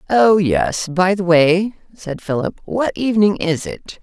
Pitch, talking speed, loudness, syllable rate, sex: 185 Hz, 165 wpm, -16 LUFS, 3.9 syllables/s, female